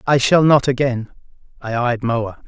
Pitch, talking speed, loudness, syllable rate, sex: 125 Hz, 170 wpm, -17 LUFS, 4.3 syllables/s, male